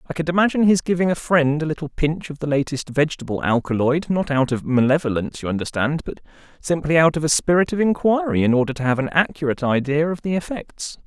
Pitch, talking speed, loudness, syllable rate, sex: 150 Hz, 210 wpm, -20 LUFS, 6.3 syllables/s, male